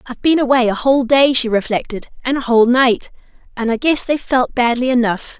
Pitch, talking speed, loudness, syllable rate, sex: 250 Hz, 210 wpm, -15 LUFS, 6.0 syllables/s, female